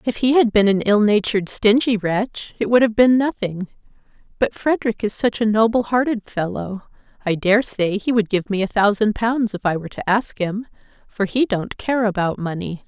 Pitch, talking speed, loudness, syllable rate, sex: 215 Hz, 200 wpm, -19 LUFS, 5.1 syllables/s, female